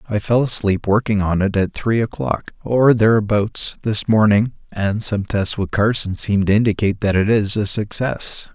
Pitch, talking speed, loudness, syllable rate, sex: 105 Hz, 185 wpm, -18 LUFS, 4.6 syllables/s, male